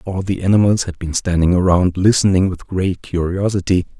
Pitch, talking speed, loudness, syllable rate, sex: 90 Hz, 165 wpm, -17 LUFS, 5.3 syllables/s, male